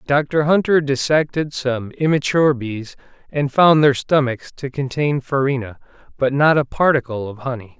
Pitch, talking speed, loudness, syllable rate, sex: 135 Hz, 145 wpm, -18 LUFS, 4.6 syllables/s, male